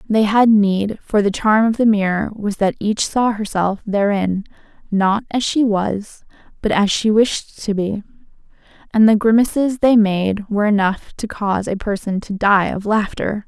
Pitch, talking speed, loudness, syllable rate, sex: 210 Hz, 180 wpm, -17 LUFS, 4.4 syllables/s, female